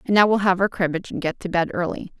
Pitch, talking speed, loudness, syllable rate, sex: 185 Hz, 300 wpm, -21 LUFS, 6.9 syllables/s, female